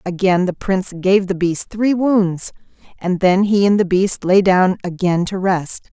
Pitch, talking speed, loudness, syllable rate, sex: 190 Hz, 190 wpm, -16 LUFS, 4.2 syllables/s, female